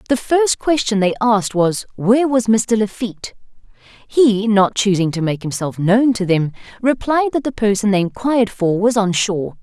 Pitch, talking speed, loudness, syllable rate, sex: 215 Hz, 180 wpm, -17 LUFS, 5.1 syllables/s, female